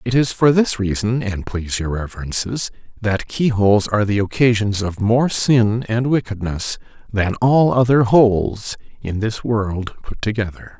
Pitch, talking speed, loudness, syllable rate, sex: 110 Hz, 160 wpm, -18 LUFS, 4.6 syllables/s, male